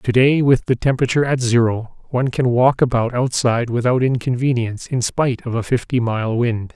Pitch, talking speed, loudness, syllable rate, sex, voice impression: 125 Hz, 180 wpm, -18 LUFS, 5.6 syllables/s, male, masculine, middle-aged, tensed, powerful, hard, clear, intellectual, slightly mature, friendly, reassuring, wild, lively, slightly modest